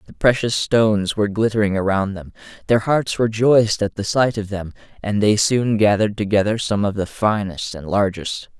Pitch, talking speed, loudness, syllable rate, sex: 105 Hz, 180 wpm, -19 LUFS, 5.2 syllables/s, male